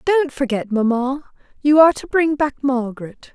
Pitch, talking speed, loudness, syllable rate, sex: 270 Hz, 160 wpm, -18 LUFS, 4.9 syllables/s, female